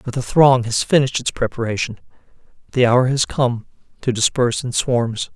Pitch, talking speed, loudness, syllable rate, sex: 120 Hz, 170 wpm, -18 LUFS, 5.3 syllables/s, male